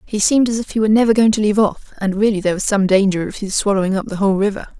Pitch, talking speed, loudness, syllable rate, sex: 205 Hz, 300 wpm, -16 LUFS, 7.7 syllables/s, female